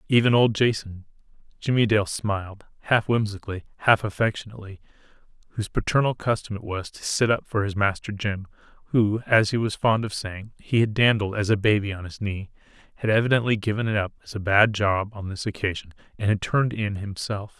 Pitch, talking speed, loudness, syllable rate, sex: 105 Hz, 180 wpm, -24 LUFS, 5.8 syllables/s, male